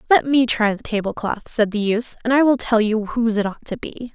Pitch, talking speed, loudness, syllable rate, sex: 230 Hz, 275 wpm, -20 LUFS, 5.6 syllables/s, female